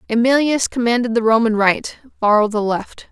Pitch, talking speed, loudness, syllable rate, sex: 230 Hz, 155 wpm, -17 LUFS, 5.2 syllables/s, female